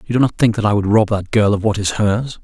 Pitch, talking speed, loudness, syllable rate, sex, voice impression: 105 Hz, 345 wpm, -16 LUFS, 6.1 syllables/s, male, masculine, adult-like, tensed, powerful, slightly hard, muffled, cool, intellectual, calm, mature, slightly friendly, reassuring, wild, lively